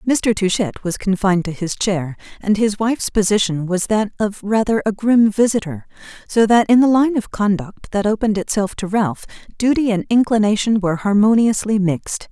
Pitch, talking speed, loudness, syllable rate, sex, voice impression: 210 Hz, 175 wpm, -17 LUFS, 5.2 syllables/s, female, feminine, very adult-like, clear, slightly fluent, slightly intellectual, sincere